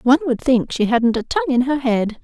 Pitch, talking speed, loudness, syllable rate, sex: 260 Hz, 270 wpm, -18 LUFS, 5.8 syllables/s, female